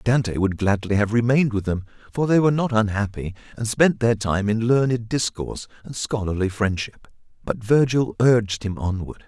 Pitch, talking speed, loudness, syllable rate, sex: 110 Hz, 175 wpm, -22 LUFS, 5.3 syllables/s, male